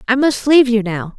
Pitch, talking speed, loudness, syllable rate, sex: 240 Hz, 255 wpm, -14 LUFS, 5.9 syllables/s, female